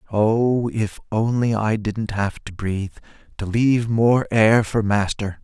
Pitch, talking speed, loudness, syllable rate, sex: 110 Hz, 155 wpm, -20 LUFS, 3.9 syllables/s, male